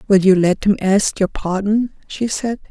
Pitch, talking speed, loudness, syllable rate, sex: 200 Hz, 200 wpm, -17 LUFS, 4.3 syllables/s, female